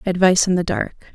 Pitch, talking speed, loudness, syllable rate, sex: 180 Hz, 210 wpm, -18 LUFS, 7.0 syllables/s, female